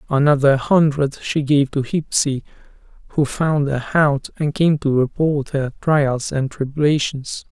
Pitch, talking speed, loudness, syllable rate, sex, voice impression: 145 Hz, 140 wpm, -19 LUFS, 4.1 syllables/s, male, masculine, adult-like, relaxed, slightly weak, slightly soft, raspy, intellectual, calm, reassuring, wild, slightly kind